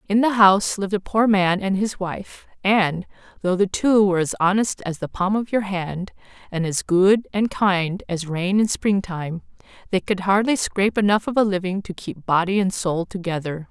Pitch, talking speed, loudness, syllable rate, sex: 190 Hz, 205 wpm, -21 LUFS, 4.8 syllables/s, female